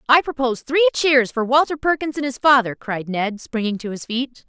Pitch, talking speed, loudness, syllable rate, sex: 260 Hz, 215 wpm, -19 LUFS, 5.4 syllables/s, female